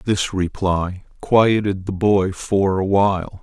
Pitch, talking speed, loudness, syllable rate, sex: 95 Hz, 140 wpm, -19 LUFS, 3.4 syllables/s, male